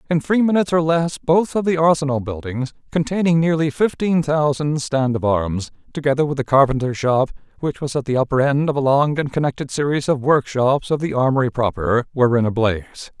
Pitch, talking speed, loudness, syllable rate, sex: 140 Hz, 200 wpm, -19 LUFS, 5.7 syllables/s, male